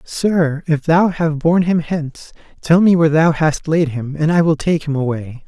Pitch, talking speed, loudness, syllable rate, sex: 155 Hz, 220 wpm, -16 LUFS, 4.8 syllables/s, male